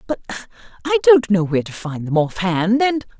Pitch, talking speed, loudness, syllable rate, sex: 205 Hz, 190 wpm, -18 LUFS, 5.4 syllables/s, female